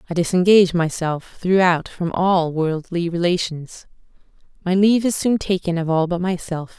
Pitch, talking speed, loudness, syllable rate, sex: 175 Hz, 150 wpm, -19 LUFS, 4.8 syllables/s, female